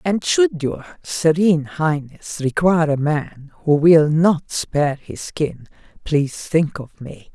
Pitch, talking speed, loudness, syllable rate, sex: 155 Hz, 145 wpm, -18 LUFS, 3.9 syllables/s, female